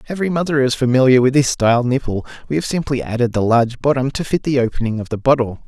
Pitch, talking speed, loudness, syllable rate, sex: 130 Hz, 235 wpm, -17 LUFS, 6.8 syllables/s, male